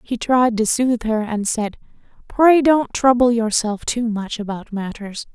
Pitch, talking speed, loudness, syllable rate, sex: 230 Hz, 170 wpm, -18 LUFS, 4.2 syllables/s, female